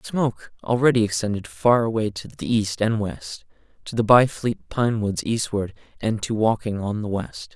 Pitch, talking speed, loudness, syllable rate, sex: 110 Hz, 175 wpm, -22 LUFS, 4.7 syllables/s, male